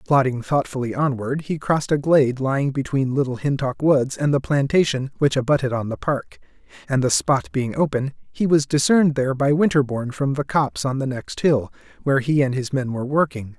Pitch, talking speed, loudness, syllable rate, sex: 135 Hz, 200 wpm, -21 LUFS, 5.6 syllables/s, male